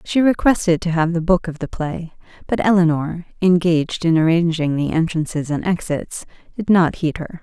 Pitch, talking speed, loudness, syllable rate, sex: 170 Hz, 180 wpm, -18 LUFS, 5.0 syllables/s, female